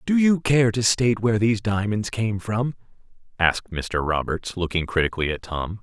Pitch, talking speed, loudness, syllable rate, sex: 105 Hz, 175 wpm, -22 LUFS, 5.3 syllables/s, male